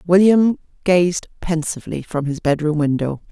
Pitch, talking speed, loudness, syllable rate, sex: 165 Hz, 125 wpm, -18 LUFS, 4.7 syllables/s, female